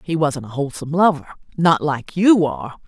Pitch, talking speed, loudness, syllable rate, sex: 155 Hz, 165 wpm, -18 LUFS, 5.9 syllables/s, female